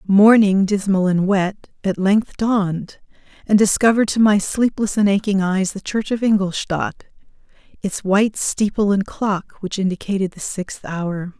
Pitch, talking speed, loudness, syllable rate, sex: 200 Hz, 155 wpm, -18 LUFS, 4.5 syllables/s, female